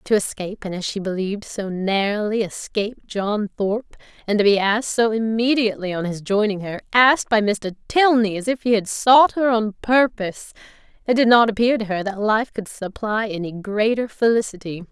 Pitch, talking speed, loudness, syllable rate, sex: 215 Hz, 180 wpm, -20 LUFS, 5.4 syllables/s, female